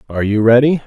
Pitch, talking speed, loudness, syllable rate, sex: 120 Hz, 210 wpm, -13 LUFS, 7.5 syllables/s, male